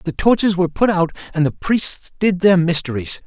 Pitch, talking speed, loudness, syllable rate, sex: 175 Hz, 200 wpm, -17 LUFS, 5.3 syllables/s, male